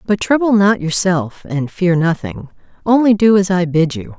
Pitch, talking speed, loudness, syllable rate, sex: 180 Hz, 185 wpm, -15 LUFS, 4.6 syllables/s, female